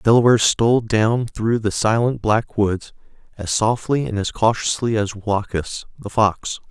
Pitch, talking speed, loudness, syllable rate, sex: 110 Hz, 160 wpm, -19 LUFS, 4.5 syllables/s, male